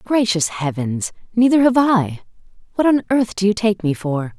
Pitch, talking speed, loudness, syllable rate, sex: 200 Hz, 180 wpm, -18 LUFS, 4.6 syllables/s, female